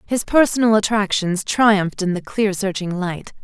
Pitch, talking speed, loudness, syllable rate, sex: 200 Hz, 155 wpm, -18 LUFS, 4.7 syllables/s, female